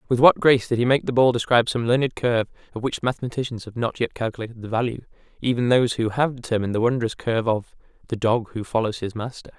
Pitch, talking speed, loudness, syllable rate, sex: 120 Hz, 220 wpm, -22 LUFS, 7.0 syllables/s, male